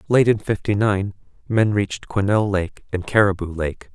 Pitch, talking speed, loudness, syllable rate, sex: 100 Hz, 165 wpm, -21 LUFS, 4.8 syllables/s, male